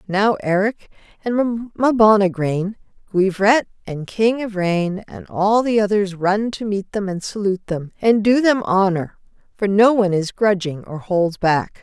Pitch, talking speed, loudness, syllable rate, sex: 200 Hz, 155 wpm, -18 LUFS, 4.3 syllables/s, female